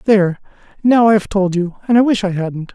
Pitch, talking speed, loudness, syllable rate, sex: 200 Hz, 220 wpm, -15 LUFS, 5.7 syllables/s, male